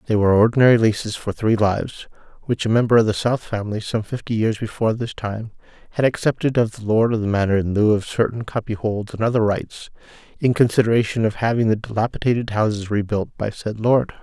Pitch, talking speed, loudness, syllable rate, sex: 110 Hz, 200 wpm, -20 LUFS, 6.1 syllables/s, male